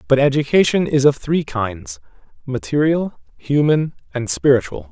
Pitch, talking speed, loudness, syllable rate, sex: 135 Hz, 120 wpm, -18 LUFS, 4.6 syllables/s, male